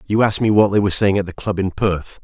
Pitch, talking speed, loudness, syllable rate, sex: 100 Hz, 325 wpm, -17 LUFS, 6.3 syllables/s, male